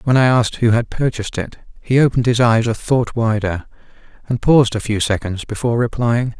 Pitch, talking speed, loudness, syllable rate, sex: 115 Hz, 195 wpm, -17 LUFS, 5.8 syllables/s, male